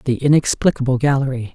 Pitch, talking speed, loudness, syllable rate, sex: 135 Hz, 115 wpm, -17 LUFS, 6.0 syllables/s, female